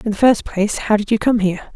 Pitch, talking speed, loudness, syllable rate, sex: 210 Hz, 310 wpm, -17 LUFS, 6.9 syllables/s, female